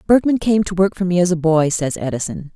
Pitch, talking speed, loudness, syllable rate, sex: 175 Hz, 260 wpm, -17 LUFS, 5.8 syllables/s, female